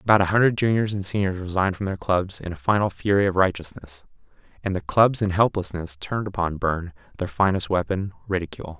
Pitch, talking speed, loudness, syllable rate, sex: 95 Hz, 190 wpm, -23 LUFS, 6.2 syllables/s, male